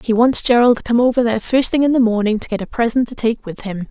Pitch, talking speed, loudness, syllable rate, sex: 235 Hz, 310 wpm, -16 LUFS, 6.6 syllables/s, female